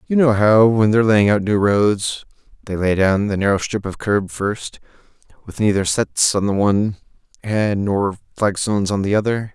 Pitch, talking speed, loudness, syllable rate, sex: 100 Hz, 190 wpm, -18 LUFS, 4.8 syllables/s, male